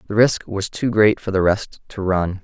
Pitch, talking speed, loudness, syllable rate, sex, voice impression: 100 Hz, 245 wpm, -19 LUFS, 4.6 syllables/s, male, masculine, adult-like, thin, slightly weak, clear, fluent, slightly intellectual, refreshing, slightly friendly, unique, kind, modest, light